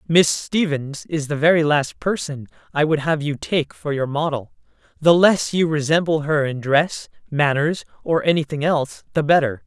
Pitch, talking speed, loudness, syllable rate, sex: 150 Hz, 175 wpm, -20 LUFS, 4.7 syllables/s, female